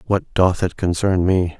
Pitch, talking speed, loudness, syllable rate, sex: 95 Hz, 190 wpm, -19 LUFS, 4.2 syllables/s, male